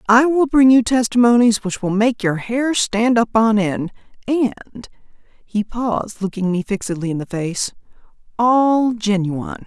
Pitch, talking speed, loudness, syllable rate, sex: 220 Hz, 150 wpm, -17 LUFS, 4.6 syllables/s, female